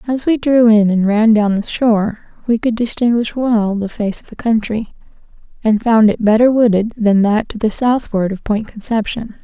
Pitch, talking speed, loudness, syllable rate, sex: 220 Hz, 195 wpm, -15 LUFS, 4.9 syllables/s, female